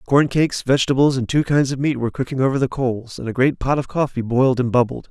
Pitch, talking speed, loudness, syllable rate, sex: 130 Hz, 260 wpm, -19 LUFS, 6.7 syllables/s, male